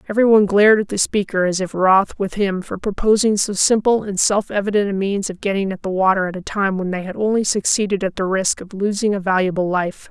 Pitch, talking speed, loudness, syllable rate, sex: 195 Hz, 245 wpm, -18 LUFS, 6.0 syllables/s, female